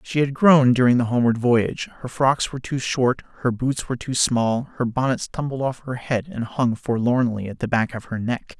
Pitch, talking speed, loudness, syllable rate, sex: 125 Hz, 225 wpm, -21 LUFS, 5.2 syllables/s, male